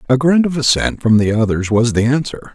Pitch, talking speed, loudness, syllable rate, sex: 130 Hz, 235 wpm, -15 LUFS, 5.6 syllables/s, male